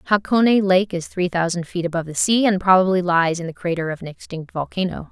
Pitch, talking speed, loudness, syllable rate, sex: 180 Hz, 225 wpm, -19 LUFS, 6.1 syllables/s, female